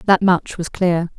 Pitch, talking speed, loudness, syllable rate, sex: 180 Hz, 200 wpm, -18 LUFS, 4.0 syllables/s, female